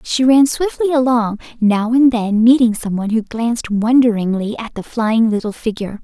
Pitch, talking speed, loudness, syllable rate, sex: 230 Hz, 170 wpm, -15 LUFS, 5.1 syllables/s, female